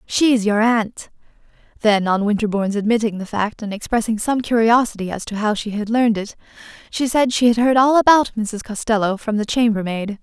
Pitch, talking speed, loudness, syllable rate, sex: 220 Hz, 190 wpm, -18 LUFS, 5.4 syllables/s, female